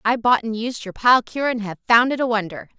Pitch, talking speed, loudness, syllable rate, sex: 230 Hz, 280 wpm, -19 LUFS, 5.5 syllables/s, female